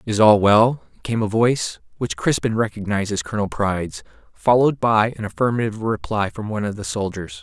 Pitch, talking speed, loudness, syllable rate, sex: 110 Hz, 180 wpm, -20 LUFS, 5.9 syllables/s, male